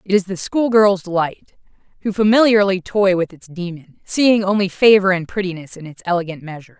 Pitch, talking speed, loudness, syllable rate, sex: 190 Hz, 175 wpm, -17 LUFS, 5.6 syllables/s, female